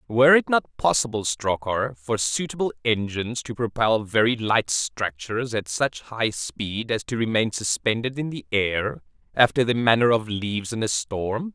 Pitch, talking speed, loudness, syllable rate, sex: 115 Hz, 165 wpm, -23 LUFS, 4.6 syllables/s, male